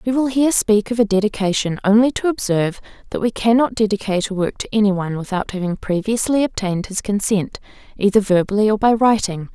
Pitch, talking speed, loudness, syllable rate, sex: 210 Hz, 190 wpm, -18 LUFS, 6.2 syllables/s, female